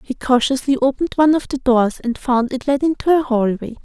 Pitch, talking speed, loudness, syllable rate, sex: 260 Hz, 220 wpm, -17 LUFS, 5.8 syllables/s, female